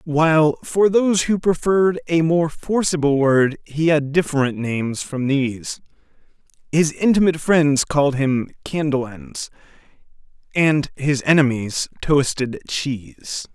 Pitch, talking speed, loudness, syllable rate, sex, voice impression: 150 Hz, 120 wpm, -19 LUFS, 4.2 syllables/s, male, masculine, middle-aged, powerful, slightly hard, slightly halting, raspy, cool, intellectual, wild, lively, intense